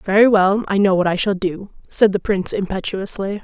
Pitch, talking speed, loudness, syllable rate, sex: 195 Hz, 210 wpm, -18 LUFS, 5.4 syllables/s, female